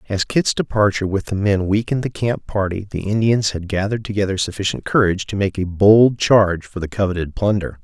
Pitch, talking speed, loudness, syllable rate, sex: 100 Hz, 200 wpm, -18 LUFS, 5.9 syllables/s, male